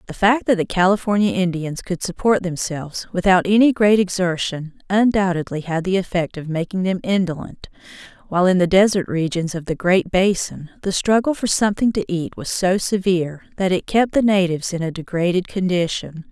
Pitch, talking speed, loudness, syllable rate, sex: 185 Hz, 175 wpm, -19 LUFS, 5.4 syllables/s, female